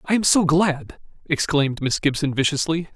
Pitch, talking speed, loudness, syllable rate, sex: 155 Hz, 160 wpm, -20 LUFS, 5.1 syllables/s, male